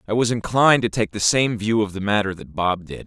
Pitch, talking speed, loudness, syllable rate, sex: 105 Hz, 275 wpm, -20 LUFS, 5.8 syllables/s, male